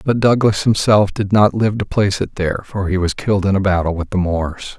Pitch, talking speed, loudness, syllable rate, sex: 100 Hz, 250 wpm, -16 LUFS, 5.6 syllables/s, male